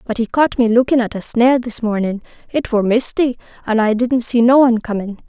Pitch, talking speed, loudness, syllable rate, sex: 235 Hz, 215 wpm, -16 LUFS, 6.0 syllables/s, female